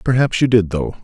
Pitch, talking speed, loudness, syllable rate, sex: 110 Hz, 230 wpm, -16 LUFS, 5.7 syllables/s, male